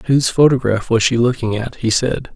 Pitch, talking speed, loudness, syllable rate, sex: 120 Hz, 205 wpm, -16 LUFS, 5.6 syllables/s, male